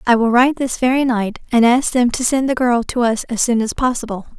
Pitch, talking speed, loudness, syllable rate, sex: 240 Hz, 260 wpm, -16 LUFS, 5.7 syllables/s, female